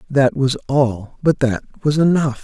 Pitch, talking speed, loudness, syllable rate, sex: 135 Hz, 175 wpm, -18 LUFS, 4.1 syllables/s, male